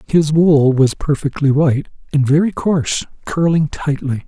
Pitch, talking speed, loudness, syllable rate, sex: 150 Hz, 140 wpm, -16 LUFS, 4.6 syllables/s, male